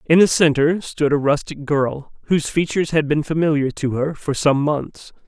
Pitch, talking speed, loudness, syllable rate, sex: 150 Hz, 195 wpm, -19 LUFS, 4.9 syllables/s, male